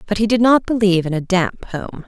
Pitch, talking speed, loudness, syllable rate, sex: 200 Hz, 260 wpm, -16 LUFS, 5.7 syllables/s, female